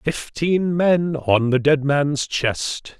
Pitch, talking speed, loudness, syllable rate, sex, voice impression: 145 Hz, 140 wpm, -19 LUFS, 2.8 syllables/s, male, very masculine, slightly old, very thick, very tensed, very powerful, bright, slightly hard, slightly muffled, fluent, slightly raspy, very cool, very intellectual, refreshing, very sincere, very calm, very mature, friendly, very reassuring, very unique, elegant, very wild, very sweet, lively, very kind, slightly modest